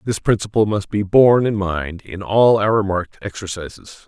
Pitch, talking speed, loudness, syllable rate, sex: 100 Hz, 175 wpm, -17 LUFS, 5.0 syllables/s, male